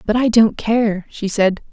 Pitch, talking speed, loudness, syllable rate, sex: 215 Hz, 210 wpm, -17 LUFS, 4.0 syllables/s, female